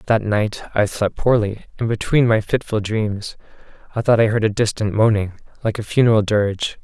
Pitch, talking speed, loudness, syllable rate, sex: 110 Hz, 185 wpm, -19 LUFS, 5.0 syllables/s, male